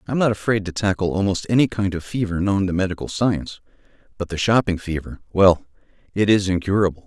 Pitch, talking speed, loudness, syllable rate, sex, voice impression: 95 Hz, 180 wpm, -20 LUFS, 6.1 syllables/s, male, masculine, adult-like, tensed, slightly clear, cool, intellectual, slightly refreshing, sincere, calm, friendly